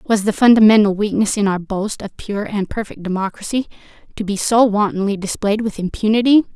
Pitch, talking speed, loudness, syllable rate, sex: 210 Hz, 175 wpm, -17 LUFS, 5.5 syllables/s, female